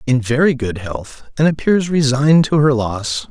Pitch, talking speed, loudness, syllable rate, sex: 135 Hz, 180 wpm, -16 LUFS, 4.5 syllables/s, male